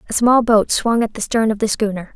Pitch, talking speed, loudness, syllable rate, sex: 220 Hz, 280 wpm, -17 LUFS, 5.6 syllables/s, female